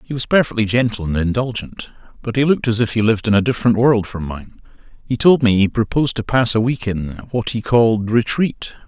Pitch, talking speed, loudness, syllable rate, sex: 115 Hz, 215 wpm, -17 LUFS, 6.0 syllables/s, male